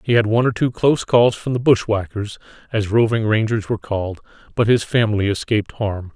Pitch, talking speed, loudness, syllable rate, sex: 110 Hz, 195 wpm, -19 LUFS, 6.0 syllables/s, male